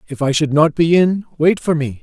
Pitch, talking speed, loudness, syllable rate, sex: 155 Hz, 265 wpm, -15 LUFS, 5.1 syllables/s, male